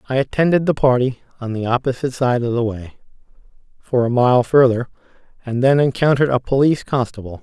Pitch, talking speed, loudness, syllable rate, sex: 125 Hz, 170 wpm, -17 LUFS, 6.1 syllables/s, male